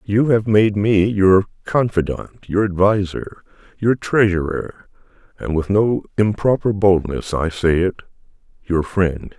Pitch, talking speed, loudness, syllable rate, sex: 100 Hz, 130 wpm, -18 LUFS, 4.0 syllables/s, male